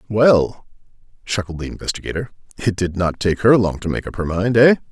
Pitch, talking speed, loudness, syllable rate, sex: 105 Hz, 195 wpm, -18 LUFS, 5.6 syllables/s, male